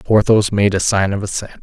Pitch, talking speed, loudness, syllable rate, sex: 100 Hz, 220 wpm, -16 LUFS, 5.3 syllables/s, male